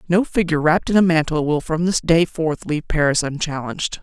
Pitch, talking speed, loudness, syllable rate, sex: 160 Hz, 210 wpm, -19 LUFS, 6.0 syllables/s, female